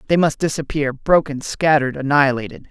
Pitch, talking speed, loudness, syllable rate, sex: 145 Hz, 135 wpm, -18 LUFS, 6.0 syllables/s, male